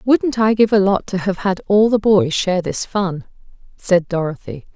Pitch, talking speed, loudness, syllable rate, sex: 190 Hz, 200 wpm, -17 LUFS, 4.7 syllables/s, female